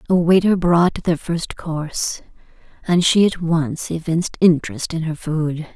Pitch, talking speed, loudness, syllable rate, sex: 165 Hz, 155 wpm, -19 LUFS, 4.4 syllables/s, female